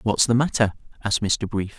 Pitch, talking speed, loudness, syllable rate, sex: 110 Hz, 200 wpm, -22 LUFS, 5.7 syllables/s, male